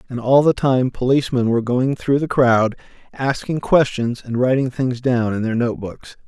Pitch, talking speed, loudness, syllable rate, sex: 125 Hz, 180 wpm, -18 LUFS, 5.0 syllables/s, male